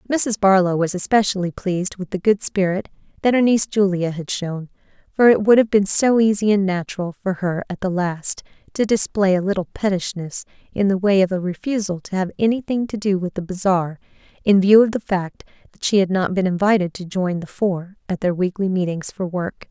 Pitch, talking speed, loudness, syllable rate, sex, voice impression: 190 Hz, 210 wpm, -19 LUFS, 5.4 syllables/s, female, feminine, adult-like, tensed, clear, fluent, intellectual, slightly calm, elegant, slightly lively, slightly strict, slightly sharp